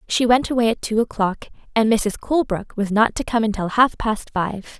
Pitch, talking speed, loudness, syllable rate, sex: 220 Hz, 215 wpm, -20 LUFS, 5.2 syllables/s, female